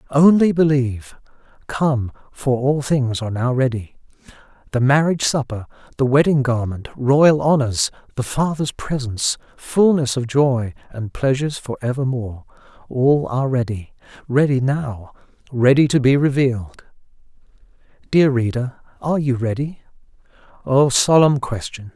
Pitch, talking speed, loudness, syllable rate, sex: 130 Hz, 110 wpm, -18 LUFS, 4.7 syllables/s, male